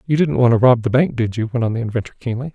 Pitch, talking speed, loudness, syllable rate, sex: 120 Hz, 330 wpm, -17 LUFS, 7.3 syllables/s, male